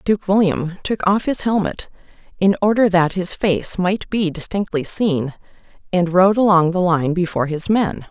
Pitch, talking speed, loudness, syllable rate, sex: 185 Hz, 170 wpm, -18 LUFS, 4.5 syllables/s, female